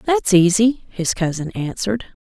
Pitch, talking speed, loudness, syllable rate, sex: 200 Hz, 135 wpm, -18 LUFS, 4.5 syllables/s, female